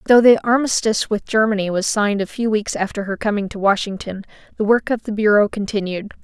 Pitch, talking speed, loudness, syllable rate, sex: 210 Hz, 200 wpm, -18 LUFS, 6.0 syllables/s, female